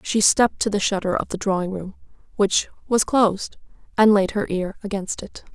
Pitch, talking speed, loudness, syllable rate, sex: 200 Hz, 195 wpm, -21 LUFS, 5.4 syllables/s, female